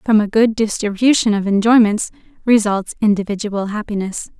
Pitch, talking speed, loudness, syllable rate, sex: 215 Hz, 125 wpm, -16 LUFS, 5.2 syllables/s, female